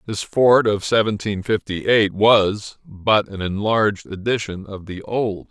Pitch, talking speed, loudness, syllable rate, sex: 105 Hz, 155 wpm, -19 LUFS, 4.0 syllables/s, male